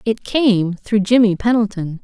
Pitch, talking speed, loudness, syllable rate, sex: 210 Hz, 145 wpm, -16 LUFS, 4.2 syllables/s, female